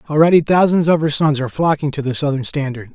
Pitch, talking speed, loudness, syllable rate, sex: 145 Hz, 225 wpm, -16 LUFS, 6.5 syllables/s, male